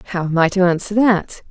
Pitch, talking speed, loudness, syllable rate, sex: 185 Hz, 240 wpm, -16 LUFS, 5.8 syllables/s, female